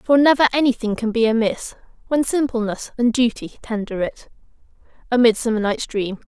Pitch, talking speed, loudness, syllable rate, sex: 245 Hz, 150 wpm, -19 LUFS, 5.0 syllables/s, female